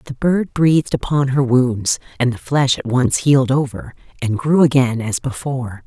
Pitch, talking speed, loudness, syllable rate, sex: 130 Hz, 185 wpm, -17 LUFS, 4.8 syllables/s, female